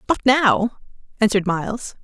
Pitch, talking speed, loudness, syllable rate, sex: 225 Hz, 120 wpm, -19 LUFS, 5.2 syllables/s, female